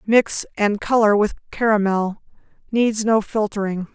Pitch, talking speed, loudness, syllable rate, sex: 210 Hz, 120 wpm, -20 LUFS, 4.3 syllables/s, female